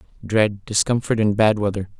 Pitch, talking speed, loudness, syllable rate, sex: 105 Hz, 180 wpm, -20 LUFS, 5.3 syllables/s, male